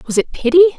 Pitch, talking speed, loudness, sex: 300 Hz, 230 wpm, -14 LUFS, female